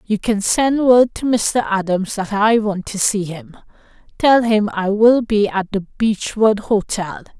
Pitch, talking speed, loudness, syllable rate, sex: 210 Hz, 180 wpm, -17 LUFS, 3.9 syllables/s, female